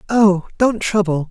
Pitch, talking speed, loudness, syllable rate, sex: 195 Hz, 140 wpm, -16 LUFS, 3.9 syllables/s, male